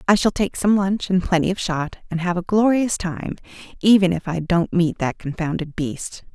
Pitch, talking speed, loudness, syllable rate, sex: 180 Hz, 210 wpm, -21 LUFS, 4.9 syllables/s, female